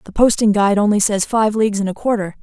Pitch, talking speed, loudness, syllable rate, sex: 210 Hz, 245 wpm, -16 LUFS, 6.6 syllables/s, female